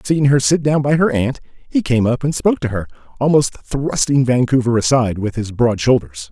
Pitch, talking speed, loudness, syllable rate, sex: 130 Hz, 210 wpm, -16 LUFS, 5.4 syllables/s, male